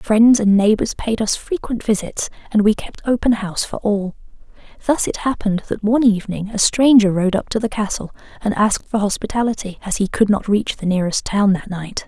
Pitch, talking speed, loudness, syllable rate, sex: 210 Hz, 205 wpm, -18 LUFS, 5.6 syllables/s, female